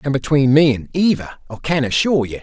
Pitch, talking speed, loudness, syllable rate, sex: 140 Hz, 225 wpm, -16 LUFS, 6.1 syllables/s, male